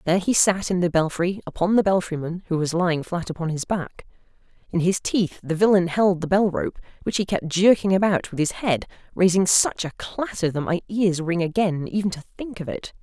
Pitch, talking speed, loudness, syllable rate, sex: 180 Hz, 220 wpm, -22 LUFS, 5.4 syllables/s, female